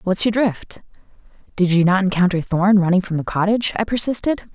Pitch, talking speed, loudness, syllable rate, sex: 195 Hz, 185 wpm, -18 LUFS, 5.7 syllables/s, female